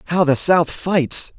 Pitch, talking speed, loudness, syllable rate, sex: 160 Hz, 175 wpm, -16 LUFS, 3.5 syllables/s, male